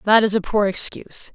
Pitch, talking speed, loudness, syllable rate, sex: 205 Hz, 225 wpm, -19 LUFS, 5.7 syllables/s, female